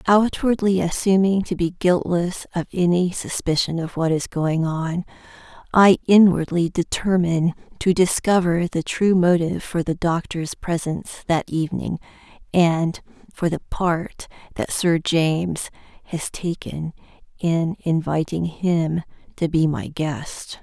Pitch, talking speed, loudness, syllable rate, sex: 170 Hz, 125 wpm, -21 LUFS, 4.1 syllables/s, female